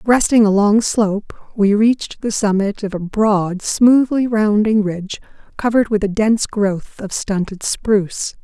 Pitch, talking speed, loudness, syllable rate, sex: 210 Hz, 155 wpm, -16 LUFS, 4.4 syllables/s, female